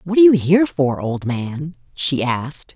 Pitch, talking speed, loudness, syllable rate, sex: 155 Hz, 195 wpm, -18 LUFS, 4.8 syllables/s, female